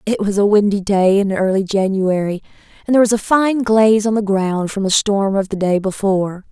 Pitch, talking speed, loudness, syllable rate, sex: 205 Hz, 220 wpm, -16 LUFS, 5.4 syllables/s, female